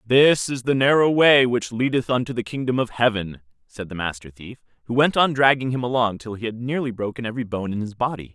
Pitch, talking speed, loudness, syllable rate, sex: 120 Hz, 230 wpm, -21 LUFS, 5.8 syllables/s, male